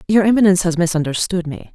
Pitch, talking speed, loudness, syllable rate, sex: 180 Hz, 170 wpm, -16 LUFS, 7.0 syllables/s, female